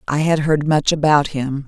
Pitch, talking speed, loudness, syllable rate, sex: 145 Hz, 215 wpm, -17 LUFS, 4.6 syllables/s, female